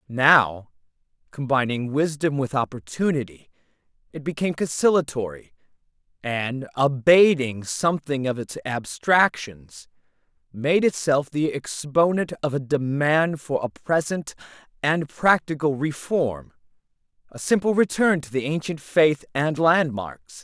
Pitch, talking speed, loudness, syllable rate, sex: 145 Hz, 105 wpm, -22 LUFS, 4.1 syllables/s, male